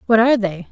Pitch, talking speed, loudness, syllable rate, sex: 215 Hz, 250 wpm, -16 LUFS, 7.4 syllables/s, female